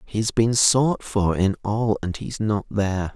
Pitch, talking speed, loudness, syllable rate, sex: 105 Hz, 210 wpm, -22 LUFS, 4.1 syllables/s, male